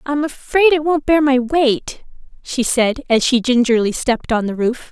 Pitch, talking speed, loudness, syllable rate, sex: 260 Hz, 195 wpm, -16 LUFS, 4.6 syllables/s, female